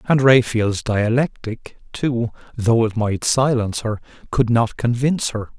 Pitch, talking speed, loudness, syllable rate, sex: 115 Hz, 140 wpm, -19 LUFS, 4.3 syllables/s, male